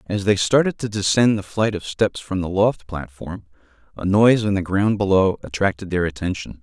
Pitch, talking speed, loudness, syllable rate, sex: 100 Hz, 200 wpm, -20 LUFS, 5.2 syllables/s, male